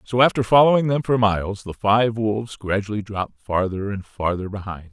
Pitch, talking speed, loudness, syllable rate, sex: 105 Hz, 185 wpm, -21 LUFS, 5.5 syllables/s, male